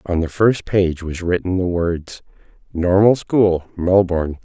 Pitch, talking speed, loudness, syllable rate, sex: 90 Hz, 150 wpm, -18 LUFS, 4.1 syllables/s, male